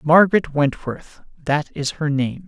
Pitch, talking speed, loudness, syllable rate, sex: 150 Hz, 120 wpm, -20 LUFS, 4.3 syllables/s, male